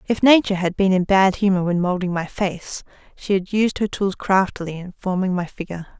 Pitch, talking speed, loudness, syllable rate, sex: 190 Hz, 210 wpm, -20 LUFS, 5.6 syllables/s, female